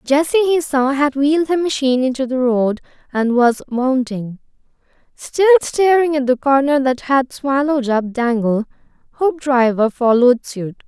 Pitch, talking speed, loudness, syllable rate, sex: 270 Hz, 145 wpm, -16 LUFS, 4.6 syllables/s, female